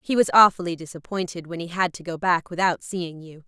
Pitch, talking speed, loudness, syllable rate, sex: 175 Hz, 225 wpm, -22 LUFS, 5.7 syllables/s, female